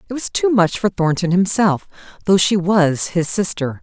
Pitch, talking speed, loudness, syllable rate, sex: 185 Hz, 190 wpm, -17 LUFS, 4.6 syllables/s, female